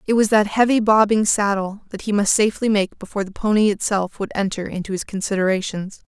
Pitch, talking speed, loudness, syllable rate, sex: 205 Hz, 195 wpm, -19 LUFS, 6.1 syllables/s, female